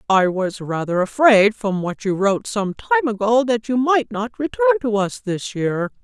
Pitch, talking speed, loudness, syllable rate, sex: 225 Hz, 200 wpm, -19 LUFS, 4.7 syllables/s, female